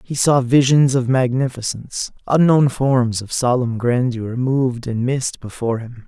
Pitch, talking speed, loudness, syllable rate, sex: 125 Hz, 150 wpm, -18 LUFS, 4.5 syllables/s, male